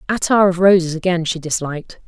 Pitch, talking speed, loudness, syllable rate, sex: 175 Hz, 175 wpm, -16 LUFS, 6.0 syllables/s, female